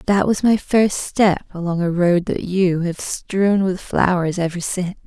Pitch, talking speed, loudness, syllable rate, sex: 185 Hz, 190 wpm, -19 LUFS, 4.1 syllables/s, female